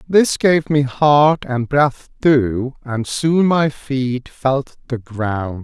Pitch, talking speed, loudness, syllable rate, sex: 135 Hz, 150 wpm, -17 LUFS, 2.7 syllables/s, male